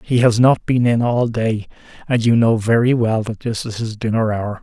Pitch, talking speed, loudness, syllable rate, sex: 115 Hz, 235 wpm, -17 LUFS, 4.9 syllables/s, male